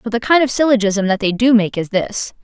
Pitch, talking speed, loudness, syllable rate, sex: 225 Hz, 270 wpm, -15 LUFS, 5.6 syllables/s, female